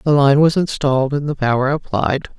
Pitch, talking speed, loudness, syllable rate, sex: 140 Hz, 200 wpm, -16 LUFS, 5.7 syllables/s, female